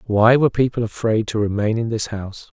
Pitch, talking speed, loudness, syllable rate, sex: 110 Hz, 210 wpm, -19 LUFS, 5.9 syllables/s, male